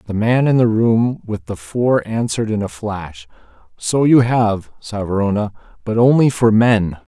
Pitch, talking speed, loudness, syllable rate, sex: 110 Hz, 170 wpm, -17 LUFS, 4.4 syllables/s, male